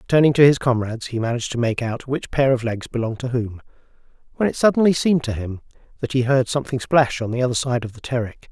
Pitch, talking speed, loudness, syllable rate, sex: 125 Hz, 240 wpm, -20 LUFS, 6.7 syllables/s, male